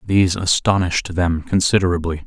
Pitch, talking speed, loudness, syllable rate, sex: 90 Hz, 105 wpm, -18 LUFS, 5.7 syllables/s, male